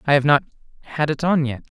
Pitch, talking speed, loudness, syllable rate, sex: 145 Hz, 235 wpm, -20 LUFS, 6.2 syllables/s, male